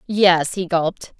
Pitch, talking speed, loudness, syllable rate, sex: 180 Hz, 150 wpm, -18 LUFS, 3.9 syllables/s, female